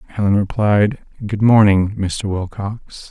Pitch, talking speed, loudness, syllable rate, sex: 100 Hz, 115 wpm, -17 LUFS, 3.8 syllables/s, male